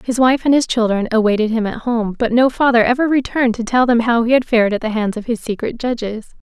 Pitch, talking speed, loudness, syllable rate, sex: 235 Hz, 260 wpm, -16 LUFS, 6.1 syllables/s, female